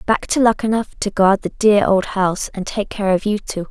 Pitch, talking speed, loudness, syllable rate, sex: 205 Hz, 245 wpm, -17 LUFS, 5.0 syllables/s, female